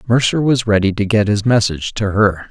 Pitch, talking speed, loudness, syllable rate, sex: 105 Hz, 215 wpm, -15 LUFS, 5.8 syllables/s, male